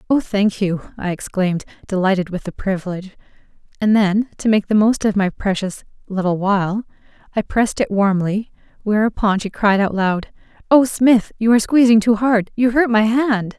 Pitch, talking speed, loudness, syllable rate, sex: 210 Hz, 170 wpm, -17 LUFS, 5.3 syllables/s, female